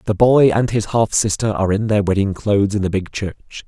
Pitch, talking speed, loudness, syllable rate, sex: 105 Hz, 245 wpm, -17 LUFS, 5.4 syllables/s, male